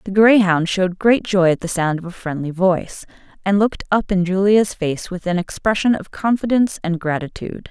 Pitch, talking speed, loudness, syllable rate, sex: 190 Hz, 195 wpm, -18 LUFS, 5.5 syllables/s, female